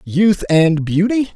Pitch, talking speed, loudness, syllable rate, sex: 185 Hz, 135 wpm, -15 LUFS, 3.5 syllables/s, male